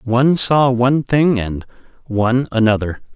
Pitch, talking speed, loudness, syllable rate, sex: 120 Hz, 135 wpm, -16 LUFS, 4.7 syllables/s, male